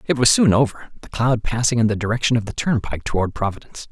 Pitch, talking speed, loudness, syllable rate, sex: 115 Hz, 230 wpm, -19 LUFS, 6.8 syllables/s, male